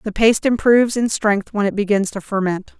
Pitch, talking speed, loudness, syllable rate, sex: 210 Hz, 215 wpm, -17 LUFS, 5.6 syllables/s, female